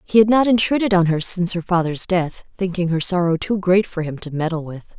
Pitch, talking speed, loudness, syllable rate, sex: 180 Hz, 240 wpm, -19 LUFS, 5.7 syllables/s, female